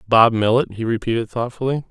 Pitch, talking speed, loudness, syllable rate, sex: 115 Hz, 160 wpm, -19 LUFS, 5.8 syllables/s, male